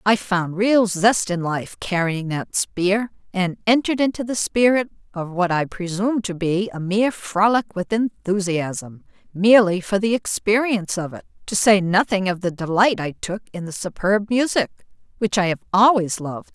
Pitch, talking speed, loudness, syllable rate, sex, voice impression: 195 Hz, 175 wpm, -20 LUFS, 4.7 syllables/s, female, feminine, middle-aged, tensed, powerful, clear, slightly halting, nasal, intellectual, calm, slightly friendly, reassuring, unique, elegant, lively, slightly sharp